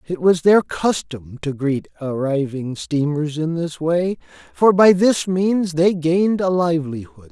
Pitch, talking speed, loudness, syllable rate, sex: 165 Hz, 155 wpm, -19 LUFS, 4.0 syllables/s, male